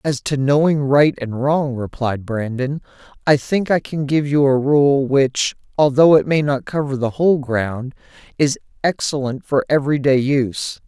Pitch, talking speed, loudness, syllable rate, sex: 140 Hz, 170 wpm, -18 LUFS, 4.5 syllables/s, male